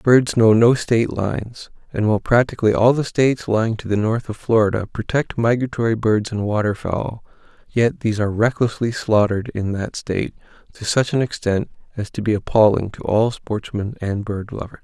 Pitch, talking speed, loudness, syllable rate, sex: 110 Hz, 180 wpm, -19 LUFS, 5.4 syllables/s, male